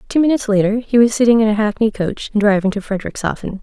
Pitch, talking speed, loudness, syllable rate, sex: 215 Hz, 230 wpm, -16 LUFS, 7.0 syllables/s, female